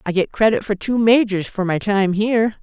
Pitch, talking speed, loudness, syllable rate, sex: 205 Hz, 230 wpm, -18 LUFS, 5.3 syllables/s, female